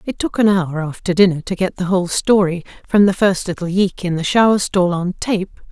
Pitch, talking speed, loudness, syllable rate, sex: 185 Hz, 230 wpm, -17 LUFS, 5.2 syllables/s, female